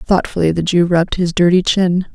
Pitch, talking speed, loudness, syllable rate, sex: 175 Hz, 195 wpm, -15 LUFS, 5.3 syllables/s, female